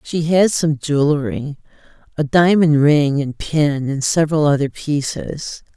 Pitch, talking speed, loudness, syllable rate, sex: 150 Hz, 125 wpm, -17 LUFS, 4.0 syllables/s, female